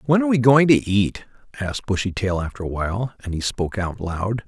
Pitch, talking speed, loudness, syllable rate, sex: 110 Hz, 215 wpm, -21 LUFS, 5.9 syllables/s, male